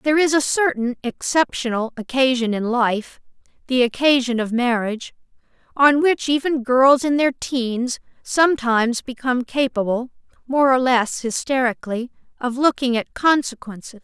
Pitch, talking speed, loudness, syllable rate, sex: 255 Hz, 120 wpm, -19 LUFS, 4.4 syllables/s, female